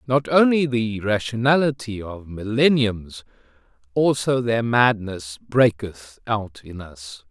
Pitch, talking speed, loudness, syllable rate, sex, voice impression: 110 Hz, 100 wpm, -20 LUFS, 3.6 syllables/s, male, masculine, very adult-like, slightly cool, sincere, slightly calm, slightly kind